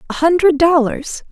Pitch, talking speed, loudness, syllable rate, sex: 310 Hz, 135 wpm, -14 LUFS, 4.7 syllables/s, female